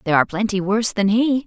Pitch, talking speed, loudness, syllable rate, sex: 210 Hz, 245 wpm, -19 LUFS, 7.4 syllables/s, female